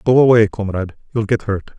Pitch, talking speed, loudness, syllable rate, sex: 110 Hz, 200 wpm, -17 LUFS, 6.2 syllables/s, male